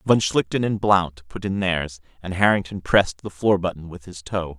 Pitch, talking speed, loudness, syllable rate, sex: 95 Hz, 210 wpm, -22 LUFS, 4.9 syllables/s, male